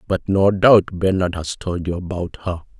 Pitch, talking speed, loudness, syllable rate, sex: 90 Hz, 195 wpm, -19 LUFS, 4.5 syllables/s, male